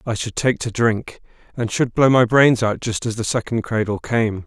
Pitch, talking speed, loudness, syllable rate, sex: 115 Hz, 230 wpm, -19 LUFS, 4.8 syllables/s, male